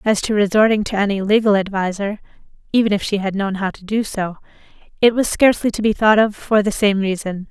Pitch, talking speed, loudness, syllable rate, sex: 205 Hz, 215 wpm, -17 LUFS, 5.9 syllables/s, female